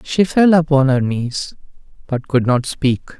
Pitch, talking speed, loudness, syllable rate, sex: 140 Hz, 170 wpm, -16 LUFS, 4.0 syllables/s, male